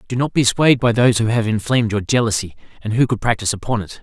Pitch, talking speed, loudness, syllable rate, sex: 115 Hz, 255 wpm, -17 LUFS, 6.9 syllables/s, male